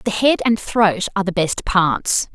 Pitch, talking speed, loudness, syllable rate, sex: 195 Hz, 205 wpm, -18 LUFS, 4.3 syllables/s, female